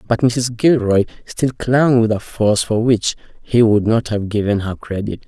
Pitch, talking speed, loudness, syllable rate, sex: 115 Hz, 195 wpm, -17 LUFS, 4.6 syllables/s, male